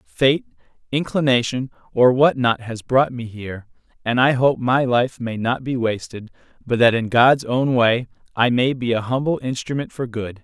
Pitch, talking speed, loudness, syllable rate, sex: 125 Hz, 185 wpm, -19 LUFS, 4.6 syllables/s, male